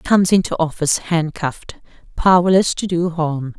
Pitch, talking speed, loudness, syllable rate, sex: 170 Hz, 150 wpm, -17 LUFS, 5.3 syllables/s, female